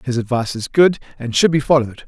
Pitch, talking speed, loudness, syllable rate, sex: 130 Hz, 230 wpm, -17 LUFS, 6.7 syllables/s, male